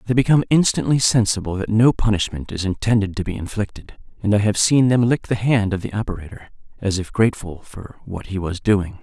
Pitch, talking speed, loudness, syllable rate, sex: 105 Hz, 205 wpm, -19 LUFS, 5.9 syllables/s, male